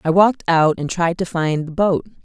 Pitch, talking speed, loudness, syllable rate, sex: 175 Hz, 240 wpm, -18 LUFS, 5.1 syllables/s, female